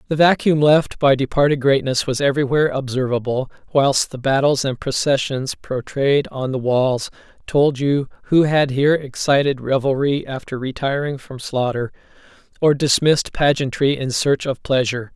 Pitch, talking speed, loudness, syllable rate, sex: 135 Hz, 145 wpm, -18 LUFS, 4.9 syllables/s, male